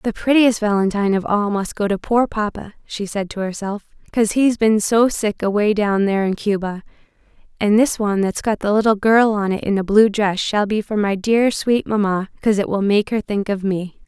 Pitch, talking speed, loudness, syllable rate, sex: 210 Hz, 225 wpm, -18 LUFS, 5.3 syllables/s, female